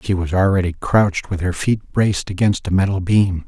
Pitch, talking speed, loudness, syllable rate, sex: 95 Hz, 205 wpm, -18 LUFS, 5.3 syllables/s, male